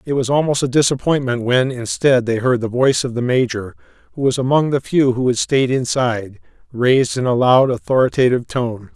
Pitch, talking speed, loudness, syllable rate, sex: 125 Hz, 180 wpm, -17 LUFS, 5.6 syllables/s, male